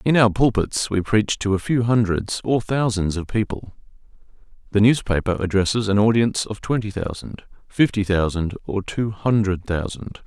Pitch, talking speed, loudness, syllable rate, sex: 105 Hz, 160 wpm, -21 LUFS, 4.9 syllables/s, male